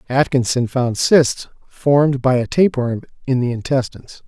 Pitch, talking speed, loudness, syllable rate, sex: 130 Hz, 140 wpm, -17 LUFS, 4.9 syllables/s, male